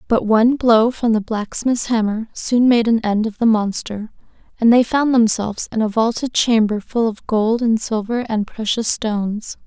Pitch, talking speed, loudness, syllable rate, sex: 225 Hz, 185 wpm, -17 LUFS, 4.6 syllables/s, female